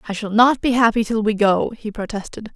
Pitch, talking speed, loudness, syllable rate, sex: 220 Hz, 235 wpm, -18 LUFS, 5.7 syllables/s, female